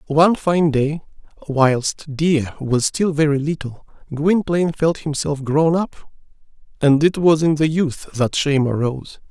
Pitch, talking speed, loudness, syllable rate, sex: 150 Hz, 150 wpm, -18 LUFS, 4.3 syllables/s, male